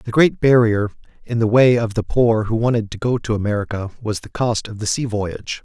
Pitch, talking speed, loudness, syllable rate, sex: 110 Hz, 235 wpm, -19 LUFS, 5.5 syllables/s, male